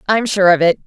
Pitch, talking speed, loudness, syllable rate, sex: 190 Hz, 275 wpm, -13 LUFS, 6.1 syllables/s, female